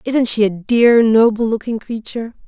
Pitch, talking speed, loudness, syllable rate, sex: 225 Hz, 170 wpm, -15 LUFS, 4.8 syllables/s, female